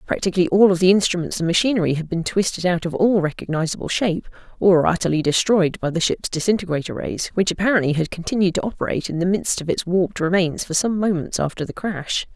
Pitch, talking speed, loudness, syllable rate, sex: 180 Hz, 205 wpm, -20 LUFS, 6.4 syllables/s, female